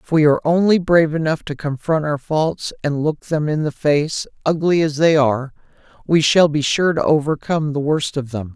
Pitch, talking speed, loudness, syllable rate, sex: 150 Hz, 210 wpm, -18 LUFS, 5.2 syllables/s, male